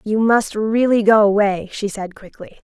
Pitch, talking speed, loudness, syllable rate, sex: 210 Hz, 175 wpm, -16 LUFS, 4.5 syllables/s, female